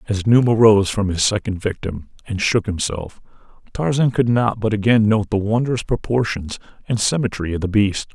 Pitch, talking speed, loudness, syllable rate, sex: 105 Hz, 175 wpm, -19 LUFS, 5.0 syllables/s, male